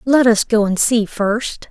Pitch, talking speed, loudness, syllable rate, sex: 225 Hz, 210 wpm, -16 LUFS, 3.8 syllables/s, female